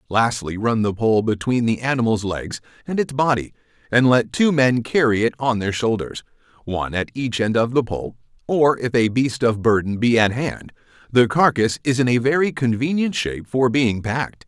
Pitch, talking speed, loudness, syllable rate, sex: 120 Hz, 195 wpm, -20 LUFS, 5.1 syllables/s, male